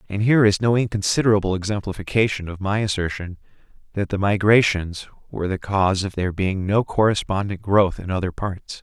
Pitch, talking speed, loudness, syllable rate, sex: 100 Hz, 165 wpm, -21 LUFS, 5.9 syllables/s, male